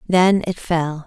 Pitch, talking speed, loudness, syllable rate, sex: 170 Hz, 170 wpm, -18 LUFS, 3.3 syllables/s, female